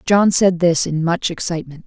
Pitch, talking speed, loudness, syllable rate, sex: 175 Hz, 195 wpm, -17 LUFS, 5.1 syllables/s, female